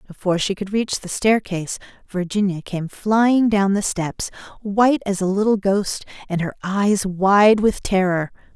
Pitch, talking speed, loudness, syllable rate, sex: 195 Hz, 160 wpm, -20 LUFS, 4.4 syllables/s, female